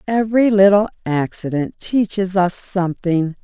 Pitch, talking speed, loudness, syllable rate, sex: 190 Hz, 105 wpm, -17 LUFS, 4.5 syllables/s, female